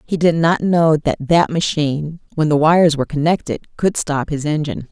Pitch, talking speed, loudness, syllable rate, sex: 155 Hz, 195 wpm, -17 LUFS, 5.2 syllables/s, female